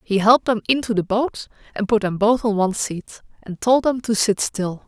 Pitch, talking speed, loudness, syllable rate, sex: 215 Hz, 235 wpm, -19 LUFS, 5.3 syllables/s, female